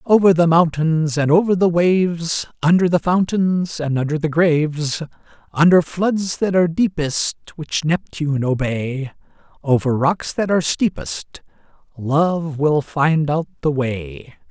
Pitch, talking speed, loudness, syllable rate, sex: 160 Hz, 135 wpm, -18 LUFS, 4.1 syllables/s, male